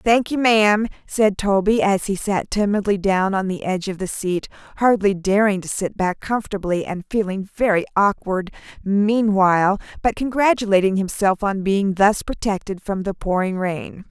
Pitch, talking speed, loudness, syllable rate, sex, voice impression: 200 Hz, 160 wpm, -20 LUFS, 4.8 syllables/s, female, feminine, slightly middle-aged, slightly fluent, slightly intellectual, slightly elegant, slightly strict